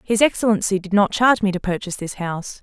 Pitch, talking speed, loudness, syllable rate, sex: 200 Hz, 230 wpm, -19 LUFS, 6.7 syllables/s, female